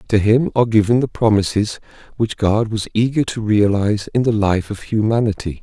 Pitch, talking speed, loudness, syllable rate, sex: 110 Hz, 180 wpm, -17 LUFS, 5.4 syllables/s, male